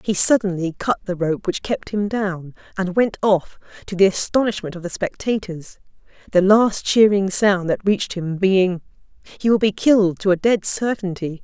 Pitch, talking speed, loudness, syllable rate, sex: 195 Hz, 175 wpm, -19 LUFS, 4.7 syllables/s, female